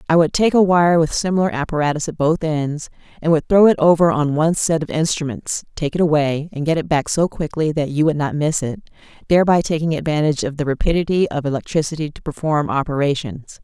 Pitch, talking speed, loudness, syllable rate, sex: 155 Hz, 205 wpm, -18 LUFS, 6.0 syllables/s, female